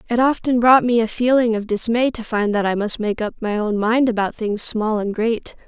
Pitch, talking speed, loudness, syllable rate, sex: 225 Hz, 245 wpm, -19 LUFS, 5.1 syllables/s, female